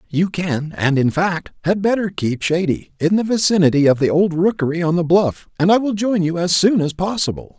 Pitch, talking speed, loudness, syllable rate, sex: 175 Hz, 220 wpm, -17 LUFS, 5.2 syllables/s, male